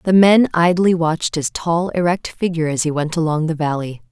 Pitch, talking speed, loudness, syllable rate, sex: 165 Hz, 205 wpm, -17 LUFS, 5.4 syllables/s, female